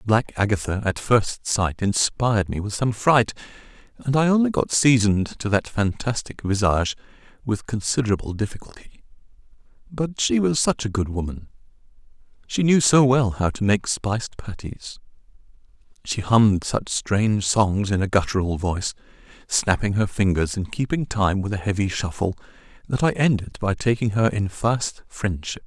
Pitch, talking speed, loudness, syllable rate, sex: 110 Hz, 155 wpm, -22 LUFS, 4.9 syllables/s, male